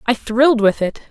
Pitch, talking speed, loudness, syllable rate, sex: 235 Hz, 215 wpm, -16 LUFS, 5.5 syllables/s, female